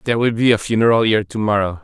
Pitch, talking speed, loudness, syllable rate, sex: 110 Hz, 260 wpm, -16 LUFS, 7.7 syllables/s, male